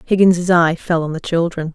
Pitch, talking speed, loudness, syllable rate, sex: 170 Hz, 205 wpm, -16 LUFS, 5.0 syllables/s, female